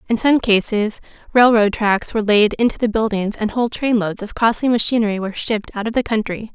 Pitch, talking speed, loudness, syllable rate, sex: 220 Hz, 200 wpm, -18 LUFS, 6.0 syllables/s, female